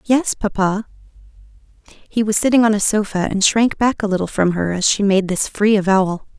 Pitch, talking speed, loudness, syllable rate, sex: 205 Hz, 195 wpm, -17 LUFS, 5.4 syllables/s, female